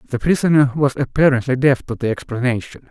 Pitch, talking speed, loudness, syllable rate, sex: 130 Hz, 165 wpm, -17 LUFS, 6.2 syllables/s, male